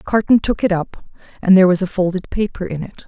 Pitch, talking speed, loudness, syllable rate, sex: 190 Hz, 235 wpm, -17 LUFS, 6.3 syllables/s, female